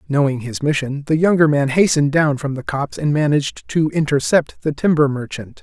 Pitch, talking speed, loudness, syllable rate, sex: 145 Hz, 190 wpm, -18 LUFS, 5.6 syllables/s, male